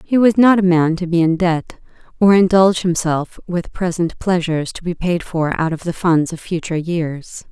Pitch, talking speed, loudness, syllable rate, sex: 175 Hz, 210 wpm, -17 LUFS, 4.9 syllables/s, female